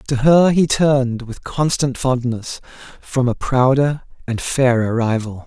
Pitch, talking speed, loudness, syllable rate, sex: 130 Hz, 145 wpm, -17 LUFS, 4.0 syllables/s, male